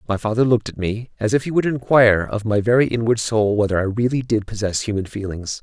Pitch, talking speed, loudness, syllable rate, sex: 110 Hz, 235 wpm, -19 LUFS, 6.2 syllables/s, male